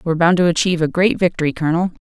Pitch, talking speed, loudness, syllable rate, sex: 170 Hz, 235 wpm, -17 LUFS, 8.2 syllables/s, female